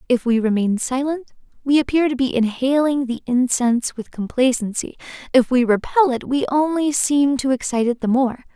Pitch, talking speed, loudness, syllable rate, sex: 260 Hz, 175 wpm, -19 LUFS, 5.2 syllables/s, female